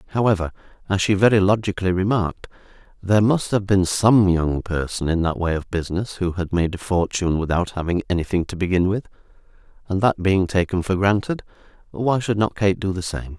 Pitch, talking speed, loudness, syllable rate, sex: 95 Hz, 190 wpm, -21 LUFS, 5.8 syllables/s, male